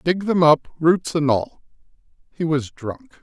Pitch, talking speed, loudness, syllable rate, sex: 155 Hz, 165 wpm, -20 LUFS, 4.1 syllables/s, male